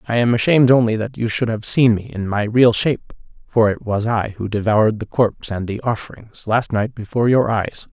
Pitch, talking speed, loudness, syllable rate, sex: 110 Hz, 220 wpm, -18 LUFS, 5.6 syllables/s, male